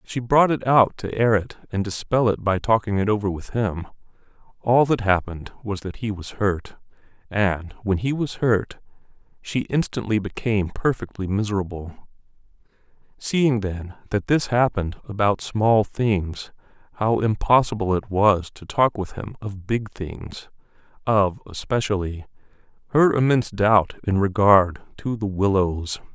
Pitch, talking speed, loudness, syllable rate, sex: 105 Hz, 145 wpm, -22 LUFS, 4.4 syllables/s, male